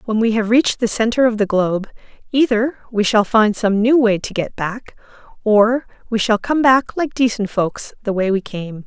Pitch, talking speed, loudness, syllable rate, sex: 220 Hz, 210 wpm, -17 LUFS, 4.9 syllables/s, female